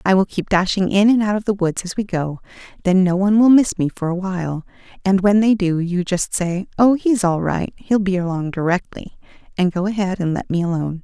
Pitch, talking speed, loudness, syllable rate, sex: 190 Hz, 240 wpm, -18 LUFS, 5.6 syllables/s, female